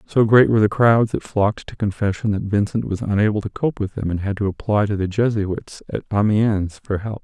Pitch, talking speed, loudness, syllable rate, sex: 105 Hz, 230 wpm, -20 LUFS, 5.5 syllables/s, male